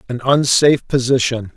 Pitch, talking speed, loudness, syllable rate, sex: 130 Hz, 115 wpm, -15 LUFS, 5.3 syllables/s, male